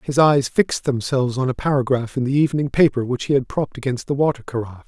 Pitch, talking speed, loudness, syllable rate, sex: 130 Hz, 235 wpm, -20 LUFS, 6.8 syllables/s, male